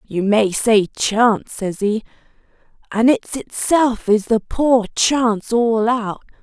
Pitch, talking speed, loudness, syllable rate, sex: 230 Hz, 140 wpm, -17 LUFS, 3.5 syllables/s, female